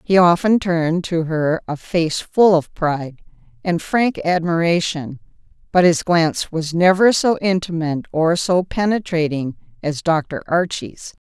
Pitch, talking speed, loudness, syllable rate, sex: 170 Hz, 140 wpm, -18 LUFS, 4.2 syllables/s, female